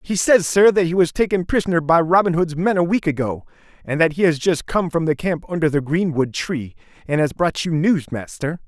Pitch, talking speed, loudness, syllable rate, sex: 165 Hz, 235 wpm, -19 LUFS, 5.4 syllables/s, male